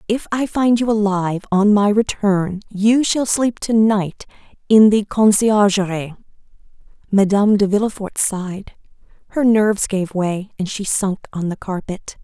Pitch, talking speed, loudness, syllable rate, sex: 205 Hz, 145 wpm, -17 LUFS, 4.5 syllables/s, female